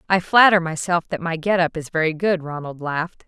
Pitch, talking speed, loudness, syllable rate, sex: 170 Hz, 220 wpm, -20 LUFS, 5.5 syllables/s, female